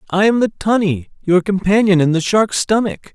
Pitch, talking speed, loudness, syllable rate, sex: 190 Hz, 190 wpm, -15 LUFS, 5.0 syllables/s, male